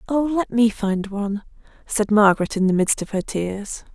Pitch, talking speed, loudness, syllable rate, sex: 210 Hz, 200 wpm, -21 LUFS, 4.9 syllables/s, female